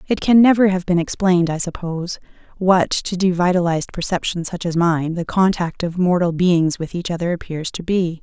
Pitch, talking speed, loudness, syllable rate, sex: 175 Hz, 190 wpm, -18 LUFS, 5.3 syllables/s, female